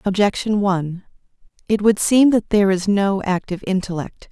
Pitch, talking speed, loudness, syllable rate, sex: 200 Hz, 155 wpm, -18 LUFS, 5.3 syllables/s, female